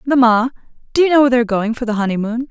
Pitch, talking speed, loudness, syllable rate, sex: 240 Hz, 240 wpm, -15 LUFS, 7.6 syllables/s, female